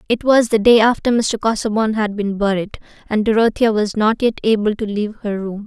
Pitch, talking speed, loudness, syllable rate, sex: 215 Hz, 210 wpm, -17 LUFS, 5.7 syllables/s, female